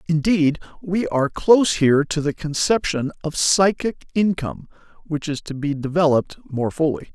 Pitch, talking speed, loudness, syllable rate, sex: 160 Hz, 150 wpm, -20 LUFS, 5.2 syllables/s, male